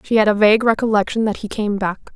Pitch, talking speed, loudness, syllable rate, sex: 210 Hz, 250 wpm, -17 LUFS, 6.4 syllables/s, female